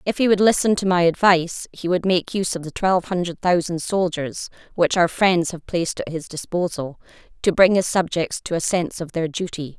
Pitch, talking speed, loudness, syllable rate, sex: 175 Hz, 215 wpm, -21 LUFS, 5.5 syllables/s, female